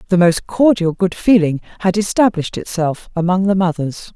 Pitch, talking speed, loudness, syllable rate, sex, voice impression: 180 Hz, 160 wpm, -16 LUFS, 5.2 syllables/s, female, very feminine, slightly old, thin, tensed, powerful, bright, very hard, very clear, halting, cool, intellectual, refreshing, very sincere, slightly calm, slightly friendly, slightly reassuring, slightly unique, elegant, slightly wild, slightly sweet, slightly lively, strict, sharp, slightly light